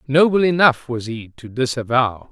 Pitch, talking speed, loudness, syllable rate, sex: 130 Hz, 155 wpm, -18 LUFS, 4.7 syllables/s, male